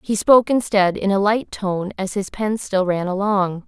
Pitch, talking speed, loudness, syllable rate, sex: 200 Hz, 215 wpm, -19 LUFS, 4.6 syllables/s, female